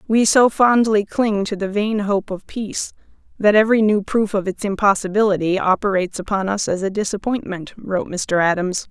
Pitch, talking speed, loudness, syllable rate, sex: 200 Hz, 175 wpm, -19 LUFS, 5.3 syllables/s, female